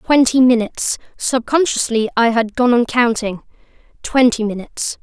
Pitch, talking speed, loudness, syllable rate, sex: 240 Hz, 95 wpm, -16 LUFS, 4.9 syllables/s, female